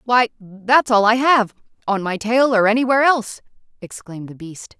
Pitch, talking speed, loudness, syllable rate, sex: 225 Hz, 165 wpm, -17 LUFS, 5.2 syllables/s, female